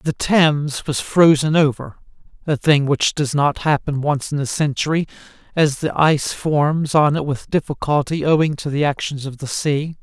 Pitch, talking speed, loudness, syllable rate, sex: 145 Hz, 175 wpm, -18 LUFS, 4.7 syllables/s, male